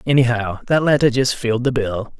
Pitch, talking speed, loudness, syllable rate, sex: 125 Hz, 190 wpm, -18 LUFS, 5.5 syllables/s, male